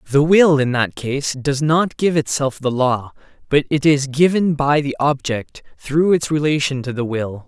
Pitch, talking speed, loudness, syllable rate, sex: 140 Hz, 195 wpm, -18 LUFS, 4.4 syllables/s, male